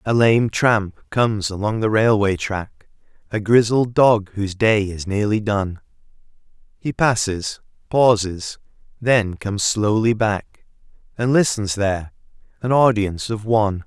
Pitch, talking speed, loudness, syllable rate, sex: 105 Hz, 125 wpm, -19 LUFS, 4.2 syllables/s, male